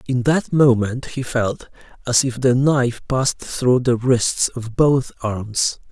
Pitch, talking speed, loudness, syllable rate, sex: 125 Hz, 160 wpm, -19 LUFS, 3.6 syllables/s, male